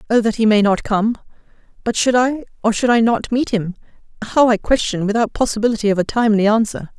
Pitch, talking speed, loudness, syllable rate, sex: 225 Hz, 190 wpm, -17 LUFS, 6.1 syllables/s, female